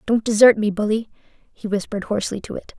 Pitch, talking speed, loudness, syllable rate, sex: 215 Hz, 195 wpm, -19 LUFS, 6.1 syllables/s, female